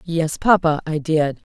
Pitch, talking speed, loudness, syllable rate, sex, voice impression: 160 Hz, 160 wpm, -19 LUFS, 3.9 syllables/s, female, feminine, adult-like, slightly intellectual, calm